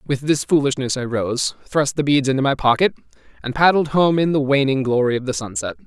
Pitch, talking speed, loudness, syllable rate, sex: 135 Hz, 215 wpm, -19 LUFS, 5.8 syllables/s, male